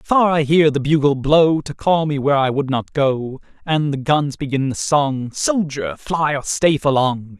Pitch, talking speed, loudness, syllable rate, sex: 145 Hz, 210 wpm, -18 LUFS, 4.3 syllables/s, male